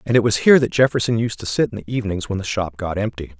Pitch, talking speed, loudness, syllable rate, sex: 105 Hz, 300 wpm, -19 LUFS, 7.2 syllables/s, male